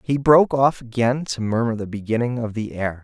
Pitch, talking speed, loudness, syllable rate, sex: 120 Hz, 215 wpm, -20 LUFS, 5.5 syllables/s, male